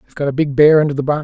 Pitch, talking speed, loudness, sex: 145 Hz, 390 wpm, -14 LUFS, male